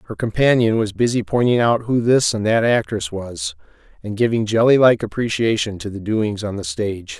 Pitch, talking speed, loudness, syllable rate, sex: 110 Hz, 190 wpm, -18 LUFS, 5.2 syllables/s, male